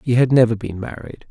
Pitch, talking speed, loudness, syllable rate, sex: 115 Hz, 230 wpm, -17 LUFS, 5.8 syllables/s, male